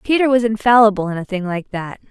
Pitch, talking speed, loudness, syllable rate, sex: 215 Hz, 230 wpm, -16 LUFS, 6.2 syllables/s, female